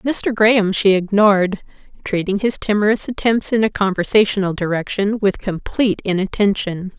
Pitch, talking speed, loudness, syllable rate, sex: 200 Hz, 130 wpm, -17 LUFS, 5.1 syllables/s, female